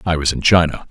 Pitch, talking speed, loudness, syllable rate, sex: 80 Hz, 265 wpm, -15 LUFS, 6.3 syllables/s, male